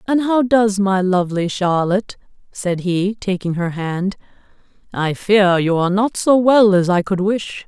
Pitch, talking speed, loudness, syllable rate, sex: 195 Hz, 170 wpm, -17 LUFS, 4.4 syllables/s, female